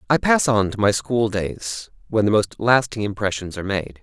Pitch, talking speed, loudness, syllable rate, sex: 105 Hz, 210 wpm, -20 LUFS, 5.0 syllables/s, male